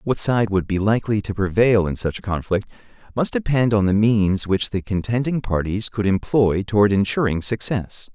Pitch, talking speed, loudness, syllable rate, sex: 105 Hz, 185 wpm, -20 LUFS, 5.0 syllables/s, male